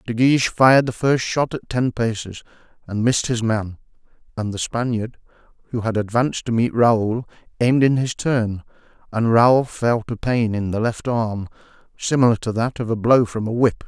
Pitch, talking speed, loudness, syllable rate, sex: 115 Hz, 190 wpm, -20 LUFS, 5.0 syllables/s, male